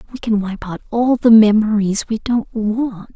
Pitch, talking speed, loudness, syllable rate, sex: 220 Hz, 190 wpm, -16 LUFS, 4.4 syllables/s, female